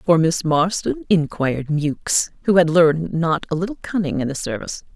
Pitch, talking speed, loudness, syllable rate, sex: 165 Hz, 180 wpm, -19 LUFS, 5.1 syllables/s, female